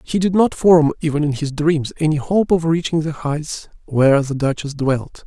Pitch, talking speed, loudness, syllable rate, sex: 155 Hz, 205 wpm, -18 LUFS, 4.8 syllables/s, male